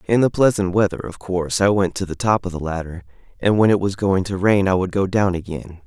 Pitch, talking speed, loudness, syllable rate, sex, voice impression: 95 Hz, 265 wpm, -19 LUFS, 5.9 syllables/s, male, masculine, adult-like, slightly thick, slightly cool, sincere, slightly calm, kind